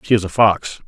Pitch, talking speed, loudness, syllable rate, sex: 100 Hz, 275 wpm, -16 LUFS, 5.4 syllables/s, male